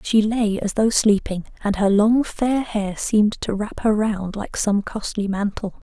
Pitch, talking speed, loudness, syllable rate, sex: 210 Hz, 195 wpm, -21 LUFS, 4.2 syllables/s, female